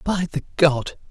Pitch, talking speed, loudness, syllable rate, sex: 155 Hz, 165 wpm, -21 LUFS, 4.6 syllables/s, male